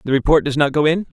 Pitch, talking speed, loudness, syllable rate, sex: 150 Hz, 300 wpm, -16 LUFS, 7.4 syllables/s, male